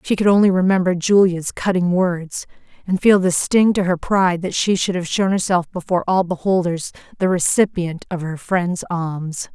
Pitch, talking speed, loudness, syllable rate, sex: 180 Hz, 180 wpm, -18 LUFS, 4.9 syllables/s, female